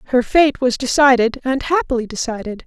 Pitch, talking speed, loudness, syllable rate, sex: 255 Hz, 160 wpm, -17 LUFS, 5.5 syllables/s, female